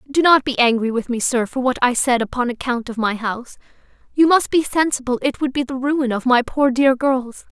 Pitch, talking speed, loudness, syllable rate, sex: 255 Hz, 235 wpm, -18 LUFS, 5.4 syllables/s, female